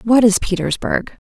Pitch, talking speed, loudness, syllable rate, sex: 215 Hz, 140 wpm, -17 LUFS, 4.6 syllables/s, female